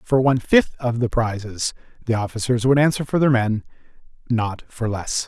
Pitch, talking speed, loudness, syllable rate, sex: 120 Hz, 180 wpm, -21 LUFS, 5.1 syllables/s, male